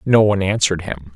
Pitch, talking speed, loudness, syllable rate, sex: 95 Hz, 205 wpm, -17 LUFS, 6.7 syllables/s, male